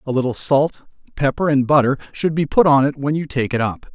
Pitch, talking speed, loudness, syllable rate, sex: 140 Hz, 245 wpm, -18 LUFS, 5.6 syllables/s, male